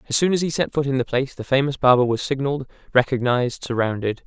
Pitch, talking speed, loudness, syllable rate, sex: 130 Hz, 225 wpm, -21 LUFS, 6.8 syllables/s, male